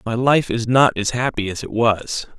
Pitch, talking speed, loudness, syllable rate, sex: 120 Hz, 225 wpm, -19 LUFS, 4.6 syllables/s, male